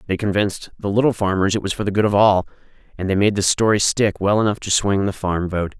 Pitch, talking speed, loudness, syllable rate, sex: 100 Hz, 260 wpm, -19 LUFS, 6.2 syllables/s, male